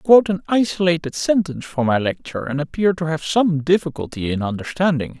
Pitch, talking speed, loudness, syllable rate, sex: 160 Hz, 195 wpm, -20 LUFS, 6.5 syllables/s, male